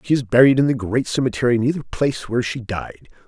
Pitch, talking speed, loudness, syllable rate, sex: 120 Hz, 240 wpm, -19 LUFS, 6.3 syllables/s, male